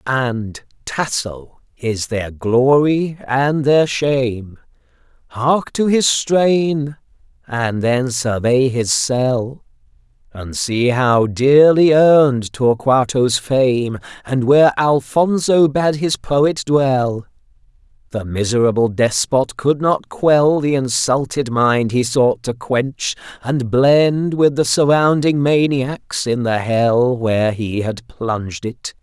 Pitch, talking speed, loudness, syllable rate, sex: 130 Hz, 120 wpm, -16 LUFS, 3.2 syllables/s, male